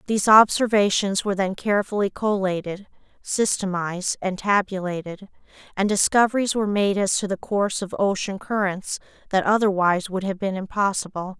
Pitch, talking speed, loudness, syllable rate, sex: 195 Hz, 135 wpm, -22 LUFS, 5.6 syllables/s, female